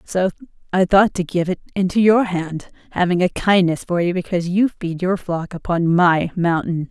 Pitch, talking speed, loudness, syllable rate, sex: 180 Hz, 190 wpm, -18 LUFS, 4.9 syllables/s, female